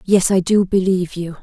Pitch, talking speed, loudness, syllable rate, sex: 185 Hz, 210 wpm, -17 LUFS, 5.4 syllables/s, female